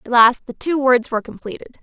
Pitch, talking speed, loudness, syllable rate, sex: 245 Hz, 230 wpm, -17 LUFS, 6.2 syllables/s, female